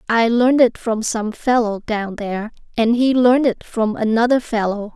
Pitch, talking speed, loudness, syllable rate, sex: 230 Hz, 180 wpm, -18 LUFS, 4.4 syllables/s, female